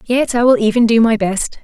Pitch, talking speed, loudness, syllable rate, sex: 230 Hz, 260 wpm, -13 LUFS, 5.3 syllables/s, female